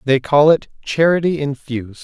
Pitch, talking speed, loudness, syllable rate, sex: 145 Hz, 145 wpm, -16 LUFS, 5.1 syllables/s, male